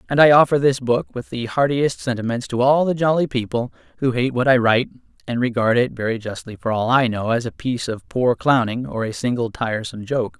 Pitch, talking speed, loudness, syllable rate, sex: 125 Hz, 225 wpm, -20 LUFS, 5.2 syllables/s, male